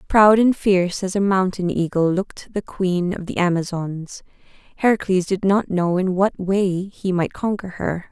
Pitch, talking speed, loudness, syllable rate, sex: 190 Hz, 180 wpm, -20 LUFS, 4.5 syllables/s, female